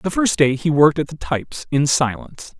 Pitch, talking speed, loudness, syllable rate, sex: 140 Hz, 230 wpm, -18 LUFS, 5.6 syllables/s, male